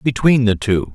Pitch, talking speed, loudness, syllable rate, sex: 115 Hz, 190 wpm, -16 LUFS, 4.4 syllables/s, male